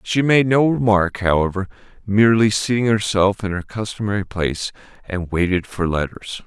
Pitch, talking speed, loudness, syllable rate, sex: 100 Hz, 150 wpm, -19 LUFS, 5.1 syllables/s, male